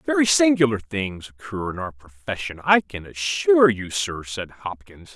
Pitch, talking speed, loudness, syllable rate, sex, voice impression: 115 Hz, 165 wpm, -21 LUFS, 4.5 syllables/s, male, masculine, middle-aged, thick, powerful, bright, slightly halting, slightly raspy, slightly mature, friendly, wild, lively, intense